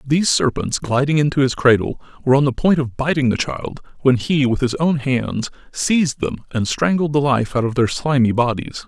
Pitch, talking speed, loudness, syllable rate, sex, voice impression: 135 Hz, 210 wpm, -18 LUFS, 5.3 syllables/s, male, very masculine, middle-aged, thick, tensed, very powerful, bright, hard, very clear, very fluent, slightly raspy, very cool, very intellectual, refreshing, very sincere, calm, mature, very friendly, very reassuring, very unique, slightly elegant, wild, sweet, very lively, kind, slightly intense